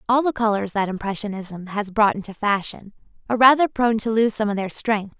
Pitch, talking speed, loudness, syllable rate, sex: 215 Hz, 210 wpm, -21 LUFS, 5.8 syllables/s, female